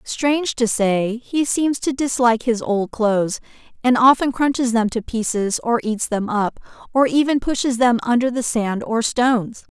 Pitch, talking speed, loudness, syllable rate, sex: 240 Hz, 180 wpm, -19 LUFS, 4.6 syllables/s, female